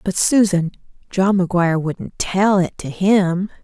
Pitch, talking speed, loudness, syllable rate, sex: 185 Hz, 150 wpm, -18 LUFS, 4.2 syllables/s, female